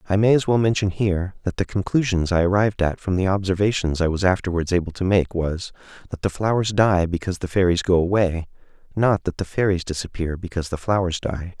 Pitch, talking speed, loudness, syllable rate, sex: 95 Hz, 205 wpm, -21 LUFS, 6.1 syllables/s, male